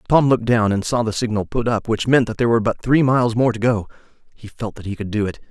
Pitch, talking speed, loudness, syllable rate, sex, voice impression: 115 Hz, 295 wpm, -19 LUFS, 6.8 syllables/s, male, masculine, very adult-like, thick, slightly sharp